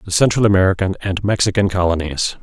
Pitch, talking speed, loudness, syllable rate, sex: 95 Hz, 150 wpm, -17 LUFS, 6.5 syllables/s, male